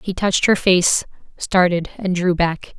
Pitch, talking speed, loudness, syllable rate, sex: 180 Hz, 170 wpm, -18 LUFS, 4.4 syllables/s, female